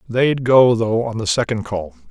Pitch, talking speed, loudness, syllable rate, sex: 115 Hz, 200 wpm, -17 LUFS, 4.4 syllables/s, male